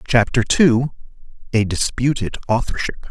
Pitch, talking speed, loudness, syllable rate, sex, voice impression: 120 Hz, 95 wpm, -19 LUFS, 4.7 syllables/s, male, masculine, middle-aged, tensed, powerful, bright, slightly muffled, raspy, mature, friendly, wild, lively, slightly strict, intense